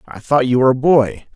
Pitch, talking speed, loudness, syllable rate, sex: 135 Hz, 265 wpm, -15 LUFS, 6.0 syllables/s, male